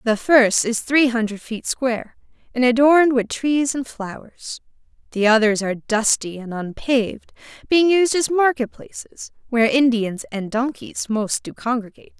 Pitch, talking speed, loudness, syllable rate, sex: 245 Hz, 150 wpm, -19 LUFS, 4.7 syllables/s, female